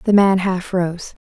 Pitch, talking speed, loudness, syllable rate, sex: 185 Hz, 190 wpm, -18 LUFS, 3.9 syllables/s, female